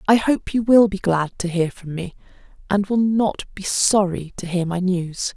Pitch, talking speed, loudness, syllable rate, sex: 190 Hz, 215 wpm, -20 LUFS, 4.4 syllables/s, female